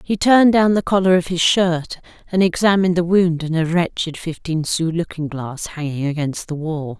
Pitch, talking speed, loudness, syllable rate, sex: 170 Hz, 195 wpm, -18 LUFS, 5.0 syllables/s, female